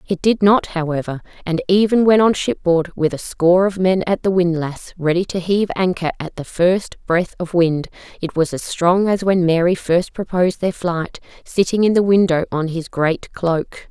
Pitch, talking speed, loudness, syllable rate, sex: 180 Hz, 200 wpm, -18 LUFS, 4.8 syllables/s, female